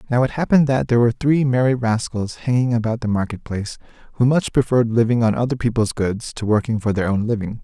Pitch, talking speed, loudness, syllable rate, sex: 120 Hz, 220 wpm, -19 LUFS, 6.4 syllables/s, male